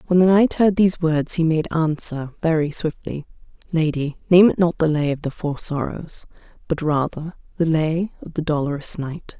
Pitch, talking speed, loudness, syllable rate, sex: 160 Hz, 185 wpm, -20 LUFS, 4.8 syllables/s, female